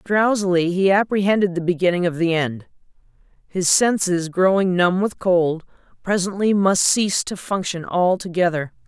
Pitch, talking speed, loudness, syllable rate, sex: 185 Hz, 135 wpm, -19 LUFS, 4.8 syllables/s, female